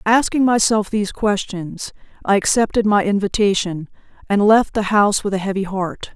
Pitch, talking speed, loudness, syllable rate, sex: 205 Hz, 155 wpm, -18 LUFS, 5.1 syllables/s, female